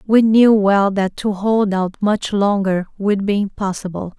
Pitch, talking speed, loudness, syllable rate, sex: 200 Hz, 170 wpm, -17 LUFS, 4.1 syllables/s, female